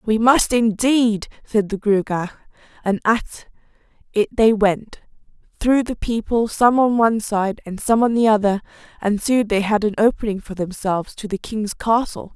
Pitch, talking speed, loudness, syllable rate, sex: 215 Hz, 170 wpm, -19 LUFS, 4.6 syllables/s, female